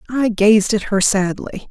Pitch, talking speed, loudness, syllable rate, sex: 210 Hz, 175 wpm, -16 LUFS, 4.0 syllables/s, female